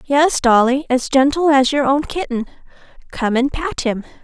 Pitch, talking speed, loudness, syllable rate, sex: 270 Hz, 170 wpm, -16 LUFS, 4.6 syllables/s, female